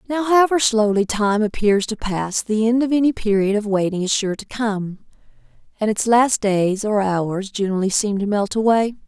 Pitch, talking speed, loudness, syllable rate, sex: 215 Hz, 190 wpm, -19 LUFS, 5.0 syllables/s, female